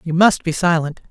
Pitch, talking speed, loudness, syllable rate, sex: 170 Hz, 215 wpm, -17 LUFS, 5.3 syllables/s, female